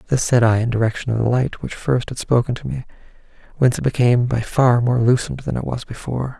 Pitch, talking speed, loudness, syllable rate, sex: 120 Hz, 235 wpm, -19 LUFS, 6.3 syllables/s, male